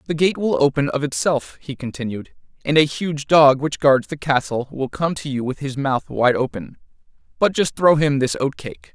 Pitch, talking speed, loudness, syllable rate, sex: 140 Hz, 215 wpm, -19 LUFS, 4.9 syllables/s, male